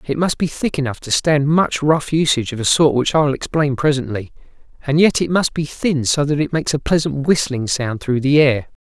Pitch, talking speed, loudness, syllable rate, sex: 145 Hz, 240 wpm, -17 LUFS, 5.4 syllables/s, male